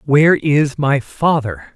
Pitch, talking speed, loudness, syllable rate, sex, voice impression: 145 Hz, 135 wpm, -15 LUFS, 3.7 syllables/s, male, masculine, slightly young, slightly calm